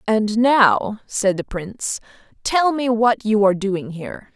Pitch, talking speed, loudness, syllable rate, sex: 215 Hz, 165 wpm, -19 LUFS, 4.0 syllables/s, female